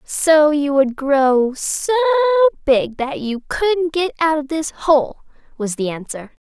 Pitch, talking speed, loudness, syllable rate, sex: 305 Hz, 155 wpm, -17 LUFS, 3.6 syllables/s, female